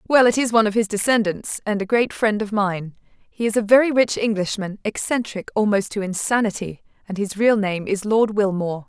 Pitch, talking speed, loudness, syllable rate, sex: 210 Hz, 205 wpm, -20 LUFS, 5.4 syllables/s, female